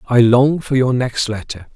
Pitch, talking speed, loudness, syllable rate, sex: 125 Hz, 205 wpm, -16 LUFS, 4.4 syllables/s, male